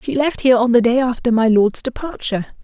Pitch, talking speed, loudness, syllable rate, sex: 245 Hz, 230 wpm, -16 LUFS, 6.3 syllables/s, female